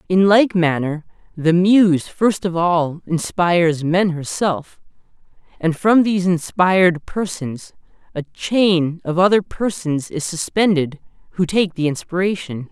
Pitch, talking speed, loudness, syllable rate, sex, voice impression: 175 Hz, 125 wpm, -18 LUFS, 4.0 syllables/s, male, slightly masculine, adult-like, slightly intellectual, slightly calm, slightly strict